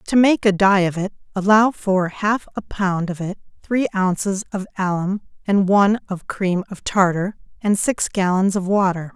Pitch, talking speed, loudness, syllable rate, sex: 195 Hz, 185 wpm, -19 LUFS, 4.6 syllables/s, female